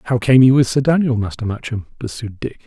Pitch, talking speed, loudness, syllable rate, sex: 120 Hz, 250 wpm, -16 LUFS, 6.4 syllables/s, male